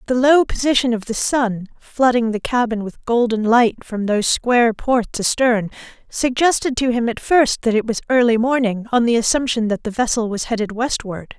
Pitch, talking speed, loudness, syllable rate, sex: 235 Hz, 190 wpm, -18 LUFS, 5.0 syllables/s, female